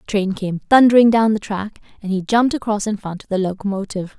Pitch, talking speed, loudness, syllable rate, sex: 205 Hz, 230 wpm, -18 LUFS, 6.4 syllables/s, female